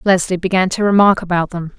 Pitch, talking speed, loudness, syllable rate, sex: 185 Hz, 200 wpm, -15 LUFS, 6.0 syllables/s, female